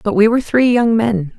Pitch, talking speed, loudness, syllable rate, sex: 215 Hz, 260 wpm, -14 LUFS, 5.6 syllables/s, female